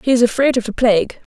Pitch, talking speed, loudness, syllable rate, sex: 235 Hz, 270 wpm, -16 LUFS, 7.0 syllables/s, female